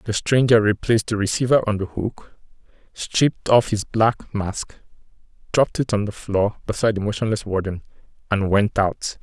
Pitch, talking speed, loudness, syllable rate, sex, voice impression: 105 Hz, 165 wpm, -21 LUFS, 5.0 syllables/s, male, masculine, middle-aged, slightly relaxed, slightly powerful, muffled, halting, raspy, calm, slightly mature, friendly, wild, slightly modest